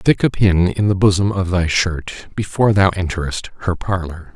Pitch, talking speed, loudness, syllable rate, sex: 95 Hz, 195 wpm, -17 LUFS, 4.9 syllables/s, male